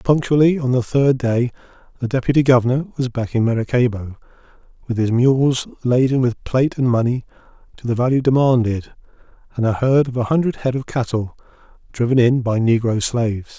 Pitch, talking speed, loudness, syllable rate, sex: 125 Hz, 170 wpm, -18 LUFS, 5.6 syllables/s, male